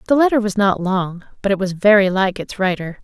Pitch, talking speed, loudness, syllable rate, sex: 200 Hz, 235 wpm, -17 LUFS, 5.6 syllables/s, female